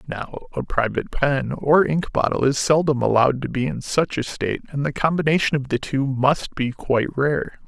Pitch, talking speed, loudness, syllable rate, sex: 135 Hz, 205 wpm, -21 LUFS, 5.1 syllables/s, male